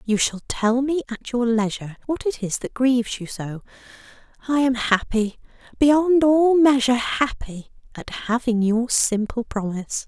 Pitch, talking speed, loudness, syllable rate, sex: 240 Hz, 145 wpm, -21 LUFS, 4.5 syllables/s, female